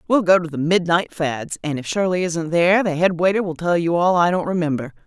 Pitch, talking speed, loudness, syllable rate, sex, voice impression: 170 Hz, 250 wpm, -19 LUFS, 5.7 syllables/s, female, feminine, middle-aged, tensed, powerful, bright, clear, fluent, intellectual, friendly, slightly elegant, lively, sharp, light